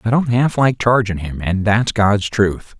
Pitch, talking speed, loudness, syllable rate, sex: 110 Hz, 215 wpm, -16 LUFS, 4.1 syllables/s, male